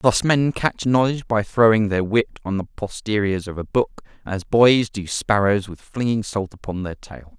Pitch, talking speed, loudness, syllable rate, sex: 105 Hz, 195 wpm, -21 LUFS, 4.6 syllables/s, male